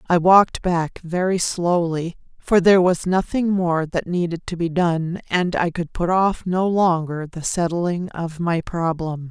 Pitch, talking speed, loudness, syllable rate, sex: 175 Hz, 175 wpm, -20 LUFS, 4.1 syllables/s, female